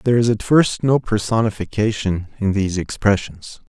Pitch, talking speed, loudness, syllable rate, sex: 105 Hz, 145 wpm, -19 LUFS, 5.3 syllables/s, male